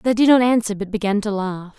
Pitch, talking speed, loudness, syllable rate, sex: 215 Hz, 270 wpm, -18 LUFS, 5.7 syllables/s, female